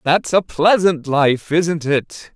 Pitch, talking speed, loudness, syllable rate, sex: 160 Hz, 155 wpm, -16 LUFS, 3.1 syllables/s, male